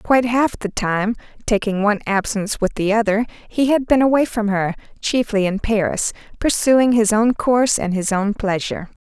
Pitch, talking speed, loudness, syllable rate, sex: 220 Hz, 165 wpm, -18 LUFS, 5.2 syllables/s, female